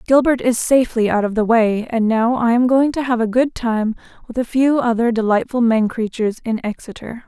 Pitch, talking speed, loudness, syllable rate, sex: 235 Hz, 215 wpm, -17 LUFS, 5.4 syllables/s, female